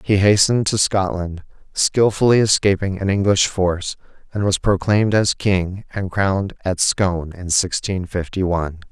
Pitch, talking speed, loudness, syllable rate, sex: 95 Hz, 150 wpm, -18 LUFS, 4.8 syllables/s, male